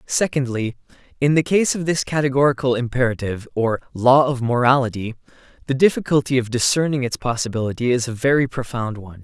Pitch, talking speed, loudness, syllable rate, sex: 130 Hz, 150 wpm, -20 LUFS, 5.2 syllables/s, male